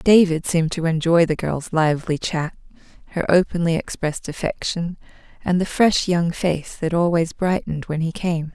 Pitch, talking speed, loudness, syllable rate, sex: 170 Hz, 160 wpm, -21 LUFS, 5.0 syllables/s, female